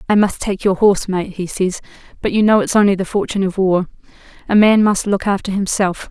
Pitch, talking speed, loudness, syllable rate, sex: 195 Hz, 225 wpm, -16 LUFS, 5.9 syllables/s, female